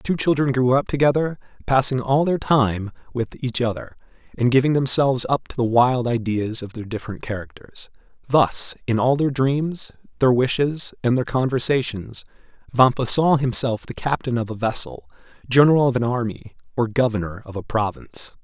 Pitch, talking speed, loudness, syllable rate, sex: 125 Hz, 170 wpm, -21 LUFS, 5.2 syllables/s, male